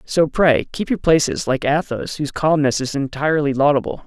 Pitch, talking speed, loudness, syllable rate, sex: 150 Hz, 175 wpm, -18 LUFS, 5.4 syllables/s, male